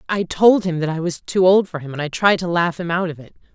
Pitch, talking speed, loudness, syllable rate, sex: 175 Hz, 320 wpm, -18 LUFS, 6.1 syllables/s, female